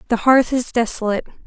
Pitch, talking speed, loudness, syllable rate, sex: 235 Hz, 165 wpm, -18 LUFS, 6.5 syllables/s, female